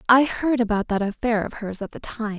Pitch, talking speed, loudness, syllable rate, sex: 225 Hz, 250 wpm, -23 LUFS, 5.4 syllables/s, female